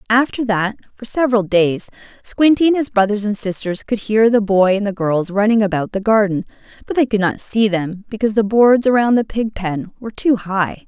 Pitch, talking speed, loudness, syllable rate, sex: 210 Hz, 210 wpm, -17 LUFS, 5.3 syllables/s, female